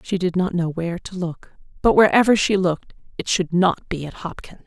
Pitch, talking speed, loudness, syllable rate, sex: 180 Hz, 220 wpm, -20 LUFS, 5.4 syllables/s, female